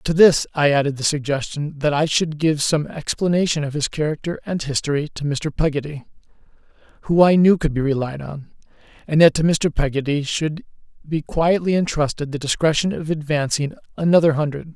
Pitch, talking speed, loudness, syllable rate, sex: 150 Hz, 170 wpm, -20 LUFS, 5.4 syllables/s, male